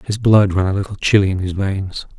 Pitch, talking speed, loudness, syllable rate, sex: 100 Hz, 245 wpm, -17 LUFS, 5.6 syllables/s, male